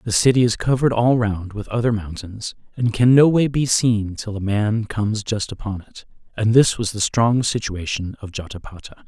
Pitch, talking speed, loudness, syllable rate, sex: 110 Hz, 200 wpm, -19 LUFS, 5.0 syllables/s, male